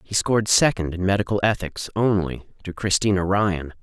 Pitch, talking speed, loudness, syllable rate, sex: 95 Hz, 155 wpm, -21 LUFS, 5.2 syllables/s, male